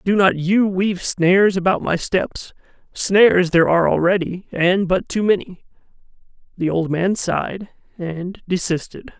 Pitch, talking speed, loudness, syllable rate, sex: 185 Hz, 145 wpm, -18 LUFS, 4.6 syllables/s, male